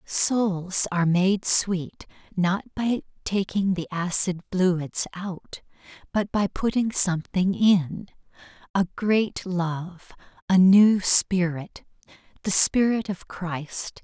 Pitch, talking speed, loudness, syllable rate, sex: 185 Hz, 105 wpm, -23 LUFS, 3.1 syllables/s, female